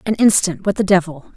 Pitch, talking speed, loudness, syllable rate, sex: 190 Hz, 220 wpm, -16 LUFS, 5.7 syllables/s, female